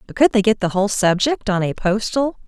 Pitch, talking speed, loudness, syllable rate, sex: 210 Hz, 245 wpm, -18 LUFS, 5.7 syllables/s, female